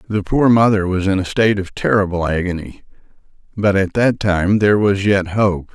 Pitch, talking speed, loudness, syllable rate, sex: 100 Hz, 190 wpm, -16 LUFS, 5.2 syllables/s, male